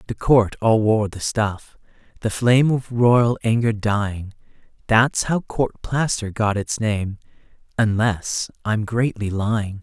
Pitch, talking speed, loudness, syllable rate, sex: 110 Hz, 140 wpm, -20 LUFS, 3.9 syllables/s, male